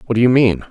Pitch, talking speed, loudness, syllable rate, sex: 115 Hz, 340 wpm, -14 LUFS, 7.7 syllables/s, male